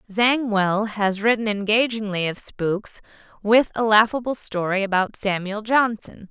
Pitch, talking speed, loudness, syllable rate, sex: 210 Hz, 125 wpm, -21 LUFS, 4.3 syllables/s, female